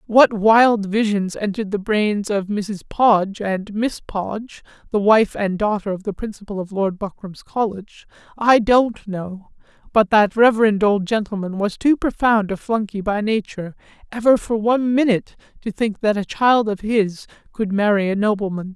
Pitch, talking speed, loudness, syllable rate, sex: 210 Hz, 170 wpm, -19 LUFS, 4.8 syllables/s, male